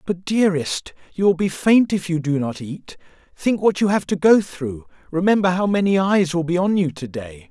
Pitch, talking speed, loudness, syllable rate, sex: 175 Hz, 225 wpm, -19 LUFS, 5.1 syllables/s, male